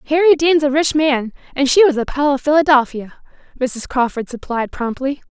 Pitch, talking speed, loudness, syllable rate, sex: 275 Hz, 180 wpm, -16 LUFS, 5.5 syllables/s, female